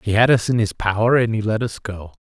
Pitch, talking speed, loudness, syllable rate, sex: 110 Hz, 295 wpm, -18 LUFS, 5.8 syllables/s, male